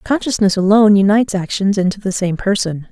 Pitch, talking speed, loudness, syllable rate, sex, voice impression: 200 Hz, 165 wpm, -15 LUFS, 6.1 syllables/s, female, very feminine, adult-like, slightly middle-aged, thin, tensed, slightly powerful, bright, hard, very clear, fluent, cool, very intellectual, very refreshing, very sincere, very calm, friendly, very reassuring, slightly unique, elegant, sweet, slightly lively, kind, slightly sharp